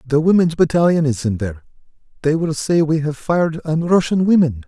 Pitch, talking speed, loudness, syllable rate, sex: 155 Hz, 180 wpm, -17 LUFS, 5.6 syllables/s, male